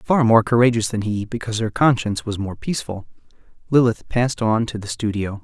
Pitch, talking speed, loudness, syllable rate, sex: 115 Hz, 190 wpm, -20 LUFS, 6.0 syllables/s, male